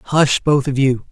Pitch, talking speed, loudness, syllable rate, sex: 135 Hz, 215 wpm, -16 LUFS, 3.8 syllables/s, male